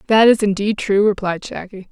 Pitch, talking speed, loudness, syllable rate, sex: 205 Hz, 190 wpm, -16 LUFS, 5.2 syllables/s, female